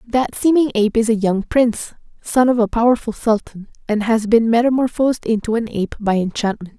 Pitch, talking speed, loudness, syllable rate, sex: 225 Hz, 185 wpm, -17 LUFS, 5.7 syllables/s, female